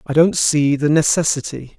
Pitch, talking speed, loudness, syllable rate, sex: 150 Hz, 170 wpm, -16 LUFS, 4.8 syllables/s, male